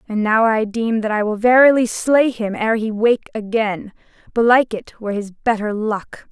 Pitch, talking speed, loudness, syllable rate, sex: 220 Hz, 190 wpm, -17 LUFS, 4.9 syllables/s, female